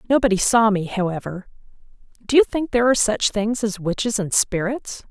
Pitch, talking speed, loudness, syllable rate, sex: 215 Hz, 165 wpm, -20 LUFS, 5.6 syllables/s, female